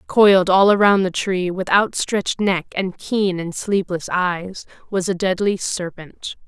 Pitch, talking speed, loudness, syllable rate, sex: 185 Hz, 160 wpm, -19 LUFS, 4.0 syllables/s, female